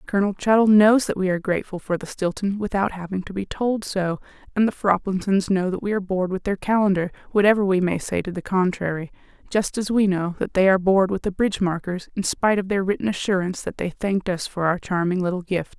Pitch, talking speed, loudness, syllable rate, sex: 190 Hz, 230 wpm, -22 LUFS, 6.3 syllables/s, female